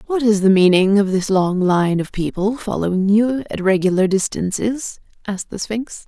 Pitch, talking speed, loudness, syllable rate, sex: 200 Hz, 180 wpm, -18 LUFS, 4.8 syllables/s, female